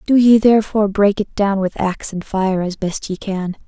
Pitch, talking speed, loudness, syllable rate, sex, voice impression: 200 Hz, 230 wpm, -17 LUFS, 5.2 syllables/s, female, feminine, slightly adult-like, soft, slightly cute, slightly friendly, reassuring, kind